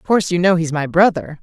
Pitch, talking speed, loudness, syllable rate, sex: 170 Hz, 295 wpm, -16 LUFS, 6.6 syllables/s, female